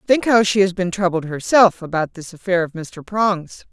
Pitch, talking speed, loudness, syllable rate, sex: 185 Hz, 210 wpm, -18 LUFS, 4.8 syllables/s, female